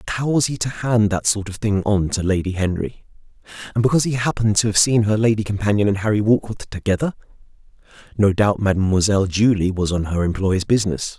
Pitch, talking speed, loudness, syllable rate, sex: 105 Hz, 195 wpm, -19 LUFS, 6.2 syllables/s, male